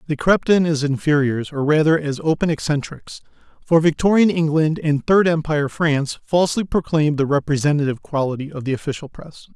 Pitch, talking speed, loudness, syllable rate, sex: 155 Hz, 170 wpm, -19 LUFS, 5.8 syllables/s, male